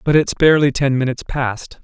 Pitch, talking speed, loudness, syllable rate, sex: 135 Hz, 195 wpm, -16 LUFS, 6.0 syllables/s, male